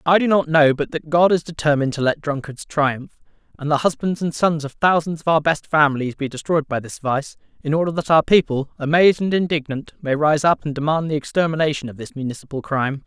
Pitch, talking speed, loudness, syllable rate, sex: 150 Hz, 220 wpm, -19 LUFS, 6.0 syllables/s, male